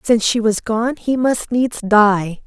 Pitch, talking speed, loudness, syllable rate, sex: 225 Hz, 195 wpm, -16 LUFS, 3.9 syllables/s, female